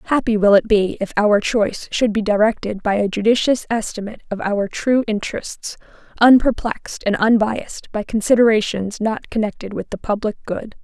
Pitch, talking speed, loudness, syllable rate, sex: 215 Hz, 160 wpm, -18 LUFS, 5.3 syllables/s, female